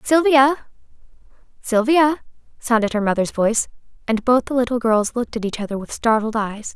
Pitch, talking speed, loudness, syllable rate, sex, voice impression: 240 Hz, 160 wpm, -19 LUFS, 5.4 syllables/s, female, very feminine, very young, very thin, tensed, slightly weak, very bright, slightly soft, very clear, fluent, very cute, intellectual, very refreshing, sincere, calm, very friendly, very reassuring, unique, very elegant, very sweet, very lively, very kind, sharp, slightly modest, very light